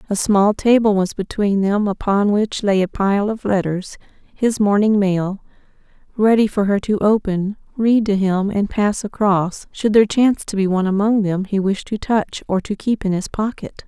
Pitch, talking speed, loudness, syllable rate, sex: 205 Hz, 185 wpm, -18 LUFS, 4.7 syllables/s, female